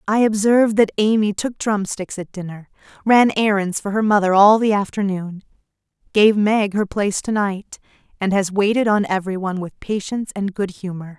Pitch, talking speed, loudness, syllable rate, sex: 200 Hz, 170 wpm, -18 LUFS, 5.3 syllables/s, female